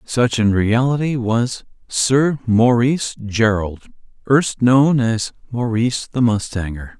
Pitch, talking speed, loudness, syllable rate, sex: 120 Hz, 105 wpm, -17 LUFS, 3.8 syllables/s, male